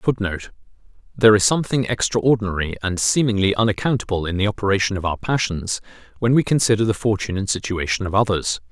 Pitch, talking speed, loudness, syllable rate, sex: 105 Hz, 160 wpm, -20 LUFS, 6.5 syllables/s, male